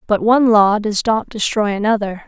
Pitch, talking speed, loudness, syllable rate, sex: 215 Hz, 185 wpm, -15 LUFS, 5.3 syllables/s, female